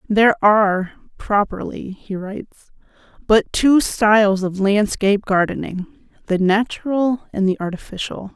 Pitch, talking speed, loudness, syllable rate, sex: 205 Hz, 115 wpm, -18 LUFS, 4.6 syllables/s, female